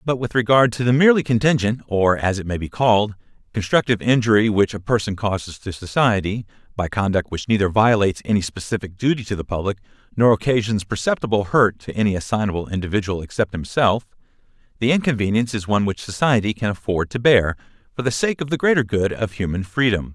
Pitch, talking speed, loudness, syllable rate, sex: 110 Hz, 185 wpm, -20 LUFS, 6.3 syllables/s, male